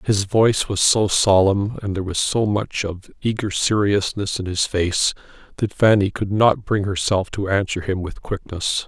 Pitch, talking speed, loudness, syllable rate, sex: 100 Hz, 185 wpm, -20 LUFS, 4.6 syllables/s, male